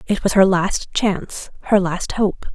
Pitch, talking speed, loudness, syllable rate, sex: 190 Hz, 190 wpm, -18 LUFS, 4.2 syllables/s, female